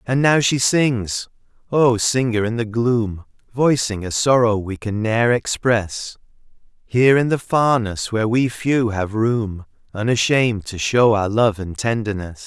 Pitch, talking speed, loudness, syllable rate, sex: 115 Hz, 155 wpm, -19 LUFS, 4.1 syllables/s, male